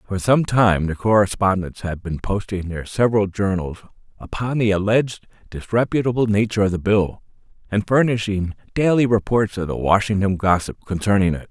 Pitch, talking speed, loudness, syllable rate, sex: 100 Hz, 150 wpm, -20 LUFS, 5.4 syllables/s, male